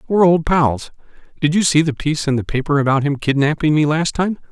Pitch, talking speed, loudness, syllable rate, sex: 150 Hz, 225 wpm, -17 LUFS, 6.1 syllables/s, male